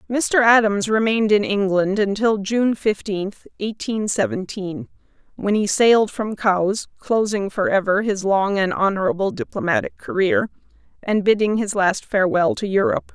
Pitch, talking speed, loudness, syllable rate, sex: 205 Hz, 135 wpm, -20 LUFS, 4.8 syllables/s, female